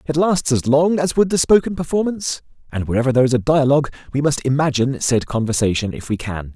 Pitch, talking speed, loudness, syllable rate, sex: 140 Hz, 210 wpm, -18 LUFS, 6.4 syllables/s, male